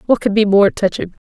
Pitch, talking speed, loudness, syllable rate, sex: 205 Hz, 235 wpm, -14 LUFS, 5.9 syllables/s, female